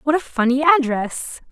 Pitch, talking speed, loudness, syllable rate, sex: 275 Hz, 160 wpm, -18 LUFS, 5.2 syllables/s, female